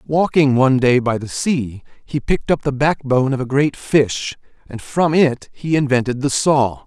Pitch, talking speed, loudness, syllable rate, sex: 135 Hz, 190 wpm, -17 LUFS, 4.7 syllables/s, male